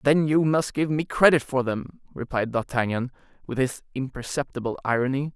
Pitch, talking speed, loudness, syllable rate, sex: 135 Hz, 155 wpm, -24 LUFS, 5.2 syllables/s, male